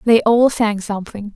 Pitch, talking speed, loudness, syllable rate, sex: 215 Hz, 175 wpm, -16 LUFS, 4.9 syllables/s, female